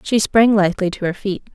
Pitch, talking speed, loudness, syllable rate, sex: 200 Hz, 235 wpm, -17 LUFS, 5.9 syllables/s, female